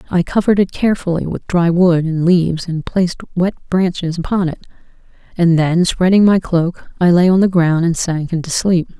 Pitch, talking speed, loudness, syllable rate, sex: 175 Hz, 195 wpm, -15 LUFS, 5.3 syllables/s, female